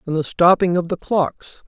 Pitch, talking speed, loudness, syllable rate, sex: 175 Hz, 215 wpm, -18 LUFS, 4.6 syllables/s, male